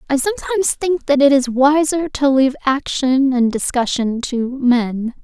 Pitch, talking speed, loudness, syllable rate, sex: 270 Hz, 160 wpm, -16 LUFS, 4.5 syllables/s, female